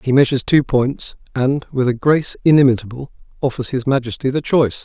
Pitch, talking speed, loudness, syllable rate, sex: 130 Hz, 175 wpm, -17 LUFS, 6.0 syllables/s, male